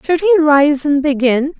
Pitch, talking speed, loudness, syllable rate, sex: 295 Hz, 190 wpm, -13 LUFS, 4.5 syllables/s, female